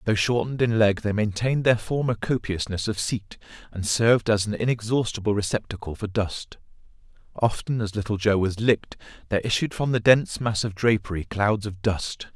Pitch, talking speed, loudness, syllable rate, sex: 105 Hz, 175 wpm, -24 LUFS, 5.5 syllables/s, male